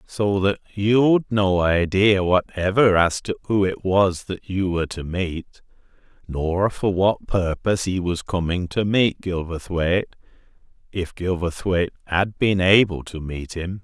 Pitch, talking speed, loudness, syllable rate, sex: 95 Hz, 145 wpm, -21 LUFS, 4.1 syllables/s, male